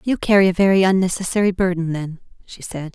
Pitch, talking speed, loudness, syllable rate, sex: 185 Hz, 185 wpm, -18 LUFS, 6.2 syllables/s, female